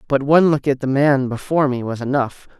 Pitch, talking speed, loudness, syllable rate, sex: 135 Hz, 230 wpm, -18 LUFS, 6.0 syllables/s, male